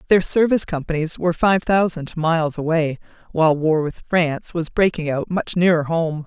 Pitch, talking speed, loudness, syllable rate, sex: 165 Hz, 170 wpm, -19 LUFS, 5.3 syllables/s, female